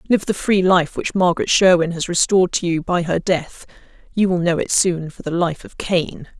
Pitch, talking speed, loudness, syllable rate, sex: 175 Hz, 215 wpm, -18 LUFS, 5.1 syllables/s, female